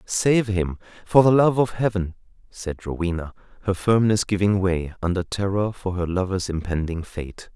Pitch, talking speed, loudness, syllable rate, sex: 95 Hz, 160 wpm, -22 LUFS, 4.7 syllables/s, male